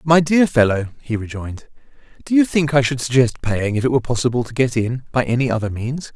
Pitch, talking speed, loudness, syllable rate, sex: 125 Hz, 225 wpm, -18 LUFS, 6.1 syllables/s, male